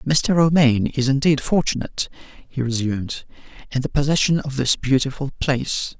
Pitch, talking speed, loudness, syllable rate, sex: 135 Hz, 140 wpm, -20 LUFS, 5.4 syllables/s, male